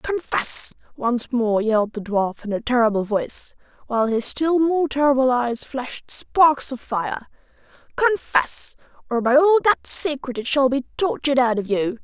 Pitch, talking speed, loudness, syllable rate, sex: 255 Hz, 160 wpm, -20 LUFS, 4.7 syllables/s, female